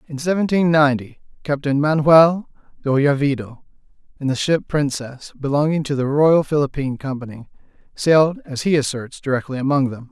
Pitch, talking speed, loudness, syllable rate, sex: 145 Hz, 140 wpm, -19 LUFS, 5.4 syllables/s, male